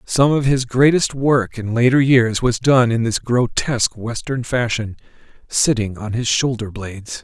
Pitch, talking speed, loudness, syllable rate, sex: 120 Hz, 160 wpm, -17 LUFS, 4.4 syllables/s, male